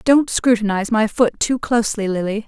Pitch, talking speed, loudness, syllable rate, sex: 220 Hz, 170 wpm, -18 LUFS, 5.1 syllables/s, female